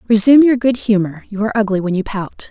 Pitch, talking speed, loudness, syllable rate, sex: 215 Hz, 215 wpm, -15 LUFS, 6.7 syllables/s, female